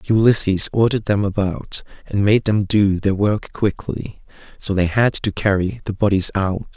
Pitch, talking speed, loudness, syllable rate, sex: 100 Hz, 170 wpm, -18 LUFS, 4.6 syllables/s, male